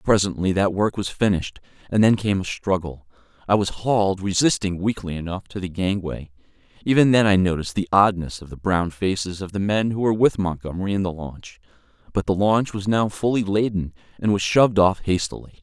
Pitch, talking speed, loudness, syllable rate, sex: 95 Hz, 195 wpm, -21 LUFS, 5.7 syllables/s, male